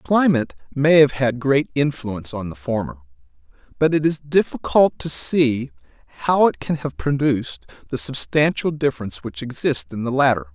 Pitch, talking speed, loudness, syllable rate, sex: 130 Hz, 160 wpm, -20 LUFS, 5.1 syllables/s, male